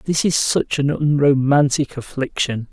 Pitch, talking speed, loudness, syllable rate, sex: 140 Hz, 130 wpm, -18 LUFS, 4.1 syllables/s, male